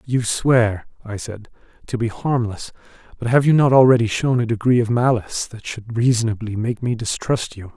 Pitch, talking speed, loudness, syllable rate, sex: 115 Hz, 185 wpm, -19 LUFS, 5.1 syllables/s, male